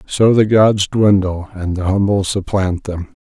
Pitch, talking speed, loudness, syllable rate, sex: 100 Hz, 165 wpm, -15 LUFS, 4.1 syllables/s, male